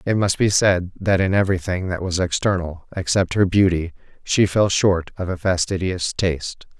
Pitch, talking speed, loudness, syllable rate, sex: 90 Hz, 175 wpm, -20 LUFS, 4.9 syllables/s, male